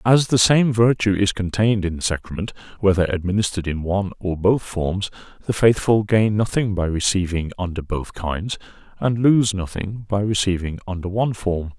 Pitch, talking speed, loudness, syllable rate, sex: 100 Hz, 170 wpm, -20 LUFS, 5.2 syllables/s, male